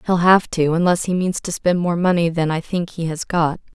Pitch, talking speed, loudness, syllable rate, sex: 170 Hz, 255 wpm, -19 LUFS, 5.2 syllables/s, female